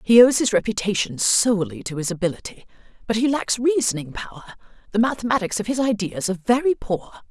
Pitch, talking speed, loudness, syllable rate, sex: 215 Hz, 165 wpm, -21 LUFS, 6.2 syllables/s, female